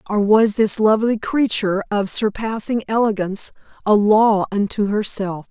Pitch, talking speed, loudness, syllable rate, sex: 210 Hz, 130 wpm, -18 LUFS, 4.8 syllables/s, female